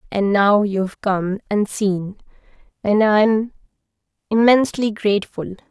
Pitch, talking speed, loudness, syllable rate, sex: 205 Hz, 95 wpm, -18 LUFS, 4.3 syllables/s, female